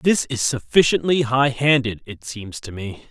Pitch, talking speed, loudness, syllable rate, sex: 125 Hz, 175 wpm, -19 LUFS, 4.3 syllables/s, male